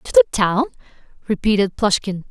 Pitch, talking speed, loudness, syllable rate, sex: 215 Hz, 130 wpm, -18 LUFS, 5.5 syllables/s, female